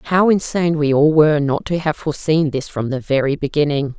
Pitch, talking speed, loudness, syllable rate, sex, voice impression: 150 Hz, 210 wpm, -17 LUFS, 5.6 syllables/s, female, feminine, gender-neutral, slightly young, slightly adult-like, slightly thin, slightly tensed, slightly powerful, slightly dark, slightly hard, clear, slightly fluent, cool, slightly intellectual, slightly refreshing, sincere, very calm, slightly friendly, slightly reassuring, unique, wild, slightly sweet, slightly lively, strict, sharp, slightly modest